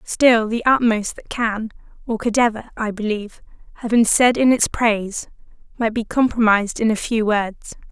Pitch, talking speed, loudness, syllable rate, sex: 220 Hz, 175 wpm, -19 LUFS, 4.8 syllables/s, female